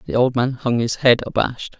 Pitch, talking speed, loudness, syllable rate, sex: 125 Hz, 235 wpm, -19 LUFS, 5.6 syllables/s, male